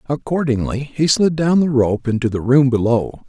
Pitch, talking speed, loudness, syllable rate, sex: 135 Hz, 185 wpm, -17 LUFS, 4.8 syllables/s, male